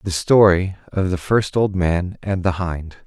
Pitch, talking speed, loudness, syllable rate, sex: 95 Hz, 195 wpm, -19 LUFS, 3.9 syllables/s, male